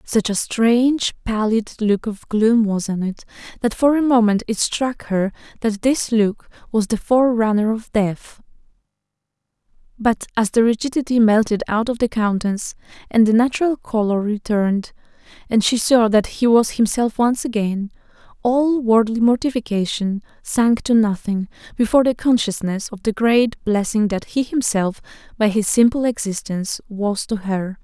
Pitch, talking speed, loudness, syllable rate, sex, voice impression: 220 Hz, 155 wpm, -19 LUFS, 4.7 syllables/s, female, feminine, adult-like, relaxed, slightly soft, clear, intellectual, calm, elegant, lively, slightly strict, sharp